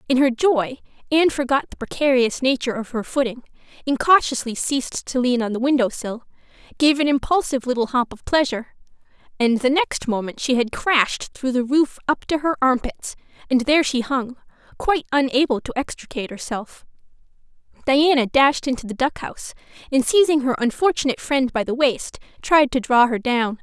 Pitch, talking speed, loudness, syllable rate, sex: 260 Hz, 175 wpm, -20 LUFS, 5.6 syllables/s, female